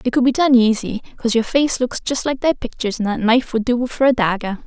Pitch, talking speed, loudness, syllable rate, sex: 240 Hz, 270 wpm, -18 LUFS, 6.2 syllables/s, female